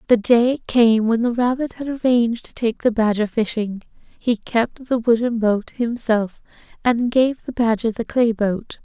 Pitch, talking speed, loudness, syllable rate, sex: 230 Hz, 175 wpm, -19 LUFS, 4.3 syllables/s, female